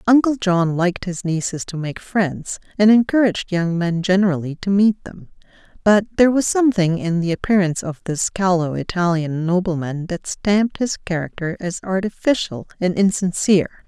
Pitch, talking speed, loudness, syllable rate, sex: 185 Hz, 155 wpm, -19 LUFS, 5.2 syllables/s, female